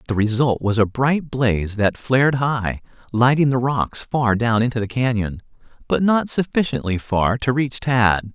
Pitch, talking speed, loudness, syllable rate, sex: 120 Hz, 175 wpm, -19 LUFS, 4.4 syllables/s, male